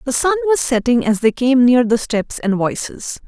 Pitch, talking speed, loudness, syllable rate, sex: 255 Hz, 220 wpm, -16 LUFS, 4.7 syllables/s, female